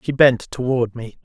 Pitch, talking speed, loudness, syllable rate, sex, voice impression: 125 Hz, 195 wpm, -19 LUFS, 4.7 syllables/s, male, masculine, adult-like, tensed, powerful, hard, clear, cool, intellectual, slightly mature, wild, lively, strict, slightly intense